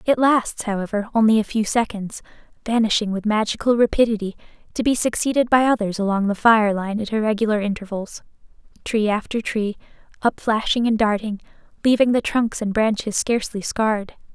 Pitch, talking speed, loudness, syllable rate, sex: 220 Hz, 150 wpm, -20 LUFS, 5.5 syllables/s, female